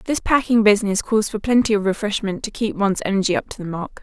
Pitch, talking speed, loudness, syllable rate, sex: 210 Hz, 240 wpm, -19 LUFS, 6.3 syllables/s, female